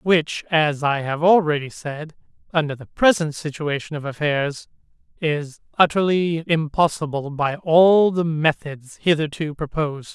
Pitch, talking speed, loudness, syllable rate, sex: 155 Hz, 125 wpm, -20 LUFS, 4.2 syllables/s, male